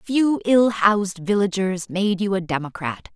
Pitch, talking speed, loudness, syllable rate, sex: 195 Hz, 170 wpm, -21 LUFS, 4.6 syllables/s, female